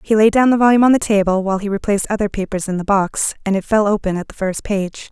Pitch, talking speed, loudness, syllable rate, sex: 205 Hz, 280 wpm, -17 LUFS, 6.8 syllables/s, female